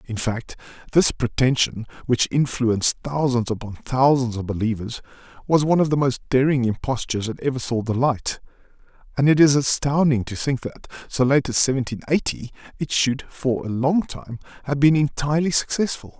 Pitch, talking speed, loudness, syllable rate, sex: 130 Hz, 165 wpm, -21 LUFS, 5.4 syllables/s, male